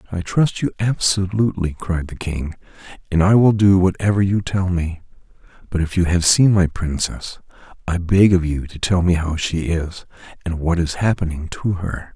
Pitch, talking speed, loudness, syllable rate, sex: 90 Hz, 190 wpm, -19 LUFS, 4.8 syllables/s, male